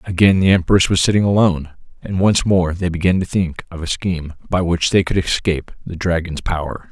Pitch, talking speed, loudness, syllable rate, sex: 90 Hz, 210 wpm, -17 LUFS, 5.6 syllables/s, male